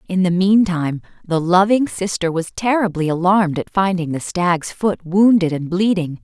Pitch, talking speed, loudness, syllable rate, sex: 180 Hz, 165 wpm, -17 LUFS, 4.8 syllables/s, female